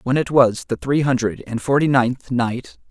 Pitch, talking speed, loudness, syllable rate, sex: 130 Hz, 205 wpm, -19 LUFS, 4.5 syllables/s, male